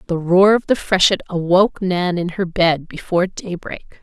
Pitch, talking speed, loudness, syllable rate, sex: 180 Hz, 180 wpm, -17 LUFS, 4.8 syllables/s, female